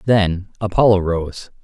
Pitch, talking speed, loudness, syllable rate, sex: 95 Hz, 110 wpm, -17 LUFS, 3.9 syllables/s, male